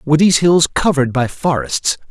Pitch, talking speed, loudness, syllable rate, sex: 150 Hz, 170 wpm, -14 LUFS, 6.0 syllables/s, male